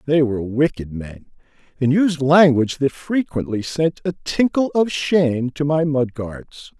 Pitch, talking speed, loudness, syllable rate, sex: 145 Hz, 150 wpm, -19 LUFS, 4.3 syllables/s, male